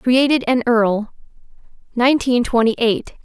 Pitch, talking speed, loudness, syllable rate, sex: 240 Hz, 110 wpm, -17 LUFS, 4.6 syllables/s, female